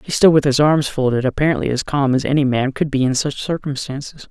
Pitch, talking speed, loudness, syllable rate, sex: 140 Hz, 235 wpm, -17 LUFS, 5.9 syllables/s, male